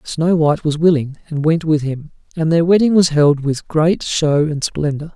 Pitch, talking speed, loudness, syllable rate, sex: 155 Hz, 210 wpm, -16 LUFS, 4.7 syllables/s, male